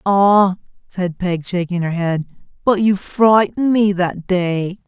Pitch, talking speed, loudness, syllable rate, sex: 190 Hz, 150 wpm, -17 LUFS, 3.8 syllables/s, female